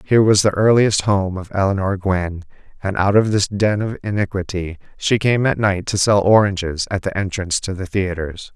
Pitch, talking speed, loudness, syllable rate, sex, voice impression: 100 Hz, 195 wpm, -18 LUFS, 5.2 syllables/s, male, masculine, adult-like, slightly powerful, slightly hard, fluent, cool, slightly sincere, mature, slightly friendly, wild, kind, modest